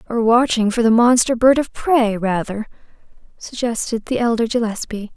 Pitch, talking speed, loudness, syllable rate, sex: 230 Hz, 150 wpm, -17 LUFS, 4.9 syllables/s, female